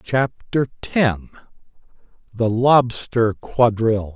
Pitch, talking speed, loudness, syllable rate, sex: 115 Hz, 70 wpm, -19 LUFS, 3.1 syllables/s, male